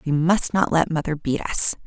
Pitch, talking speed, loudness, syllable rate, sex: 160 Hz, 225 wpm, -21 LUFS, 4.8 syllables/s, female